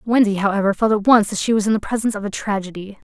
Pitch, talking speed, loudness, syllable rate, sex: 210 Hz, 270 wpm, -18 LUFS, 7.2 syllables/s, female